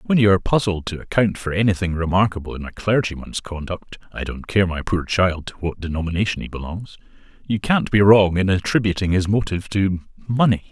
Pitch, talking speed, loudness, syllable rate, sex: 95 Hz, 185 wpm, -20 LUFS, 4.5 syllables/s, male